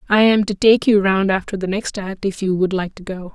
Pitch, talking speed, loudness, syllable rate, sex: 195 Hz, 285 wpm, -18 LUFS, 5.4 syllables/s, female